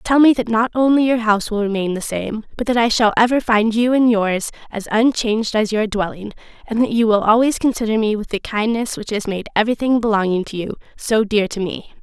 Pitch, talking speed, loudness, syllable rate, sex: 220 Hz, 230 wpm, -18 LUFS, 5.7 syllables/s, female